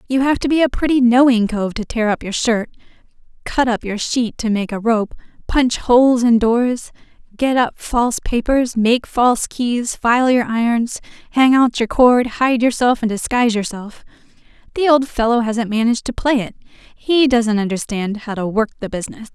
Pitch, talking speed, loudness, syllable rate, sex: 235 Hz, 185 wpm, -17 LUFS, 4.9 syllables/s, female